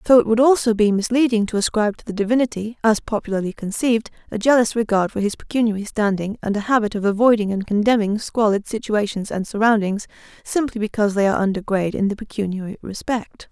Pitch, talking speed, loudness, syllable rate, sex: 215 Hz, 185 wpm, -20 LUFS, 6.4 syllables/s, female